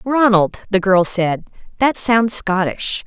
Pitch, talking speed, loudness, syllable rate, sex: 205 Hz, 135 wpm, -16 LUFS, 3.5 syllables/s, female